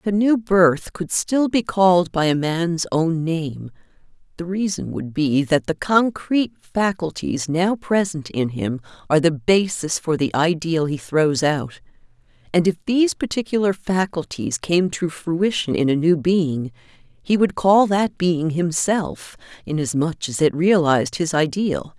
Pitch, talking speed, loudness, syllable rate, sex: 170 Hz, 160 wpm, -20 LUFS, 4.2 syllables/s, female